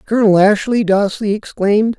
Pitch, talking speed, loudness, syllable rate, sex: 210 Hz, 120 wpm, -14 LUFS, 5.3 syllables/s, male